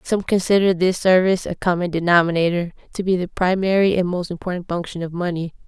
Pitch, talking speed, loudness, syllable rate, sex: 180 Hz, 190 wpm, -20 LUFS, 6.3 syllables/s, female